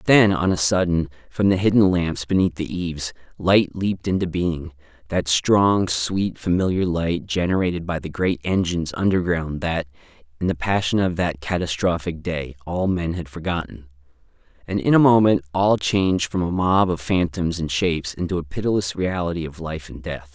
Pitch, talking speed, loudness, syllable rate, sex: 85 Hz, 170 wpm, -21 LUFS, 5.0 syllables/s, male